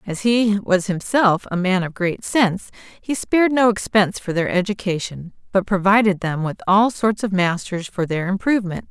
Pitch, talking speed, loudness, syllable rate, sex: 195 Hz, 180 wpm, -19 LUFS, 4.9 syllables/s, female